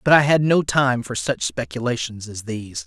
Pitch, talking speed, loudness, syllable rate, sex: 120 Hz, 210 wpm, -21 LUFS, 5.1 syllables/s, male